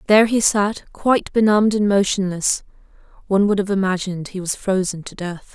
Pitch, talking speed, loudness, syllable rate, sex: 200 Hz, 175 wpm, -19 LUFS, 5.7 syllables/s, female